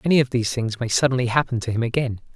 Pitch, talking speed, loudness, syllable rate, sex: 125 Hz, 255 wpm, -22 LUFS, 7.5 syllables/s, male